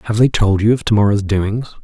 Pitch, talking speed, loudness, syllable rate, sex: 105 Hz, 260 wpm, -15 LUFS, 5.9 syllables/s, male